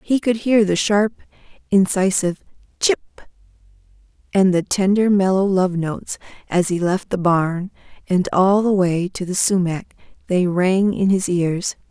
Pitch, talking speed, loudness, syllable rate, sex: 190 Hz, 150 wpm, -18 LUFS, 4.3 syllables/s, female